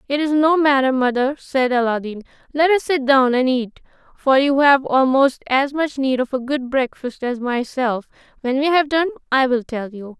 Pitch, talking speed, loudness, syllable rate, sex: 265 Hz, 200 wpm, -18 LUFS, 4.8 syllables/s, female